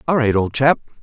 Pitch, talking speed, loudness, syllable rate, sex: 130 Hz, 235 wpm, -17 LUFS, 6.2 syllables/s, male